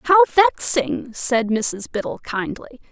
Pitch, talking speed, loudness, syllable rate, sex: 270 Hz, 125 wpm, -19 LUFS, 3.5 syllables/s, female